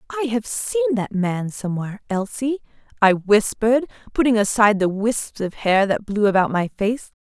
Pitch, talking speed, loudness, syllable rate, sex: 220 Hz, 165 wpm, -20 LUFS, 4.9 syllables/s, female